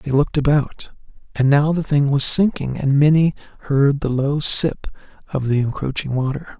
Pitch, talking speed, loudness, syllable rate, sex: 140 Hz, 175 wpm, -18 LUFS, 4.9 syllables/s, male